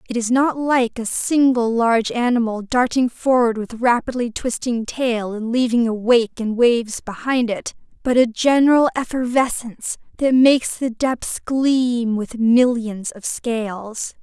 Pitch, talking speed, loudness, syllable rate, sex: 240 Hz, 150 wpm, -19 LUFS, 4.2 syllables/s, female